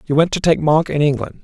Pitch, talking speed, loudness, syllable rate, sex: 155 Hz, 290 wpm, -16 LUFS, 6.3 syllables/s, male